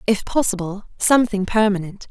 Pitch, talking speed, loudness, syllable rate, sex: 205 Hz, 115 wpm, -19 LUFS, 5.5 syllables/s, female